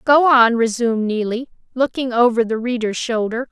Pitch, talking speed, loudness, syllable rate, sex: 235 Hz, 155 wpm, -17 LUFS, 5.1 syllables/s, female